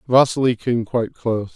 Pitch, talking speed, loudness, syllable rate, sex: 120 Hz, 155 wpm, -20 LUFS, 5.8 syllables/s, male